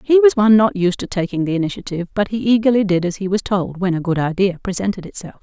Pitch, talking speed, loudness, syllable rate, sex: 195 Hz, 255 wpm, -18 LUFS, 6.8 syllables/s, female